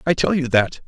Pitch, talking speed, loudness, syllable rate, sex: 140 Hz, 275 wpm, -19 LUFS, 5.5 syllables/s, male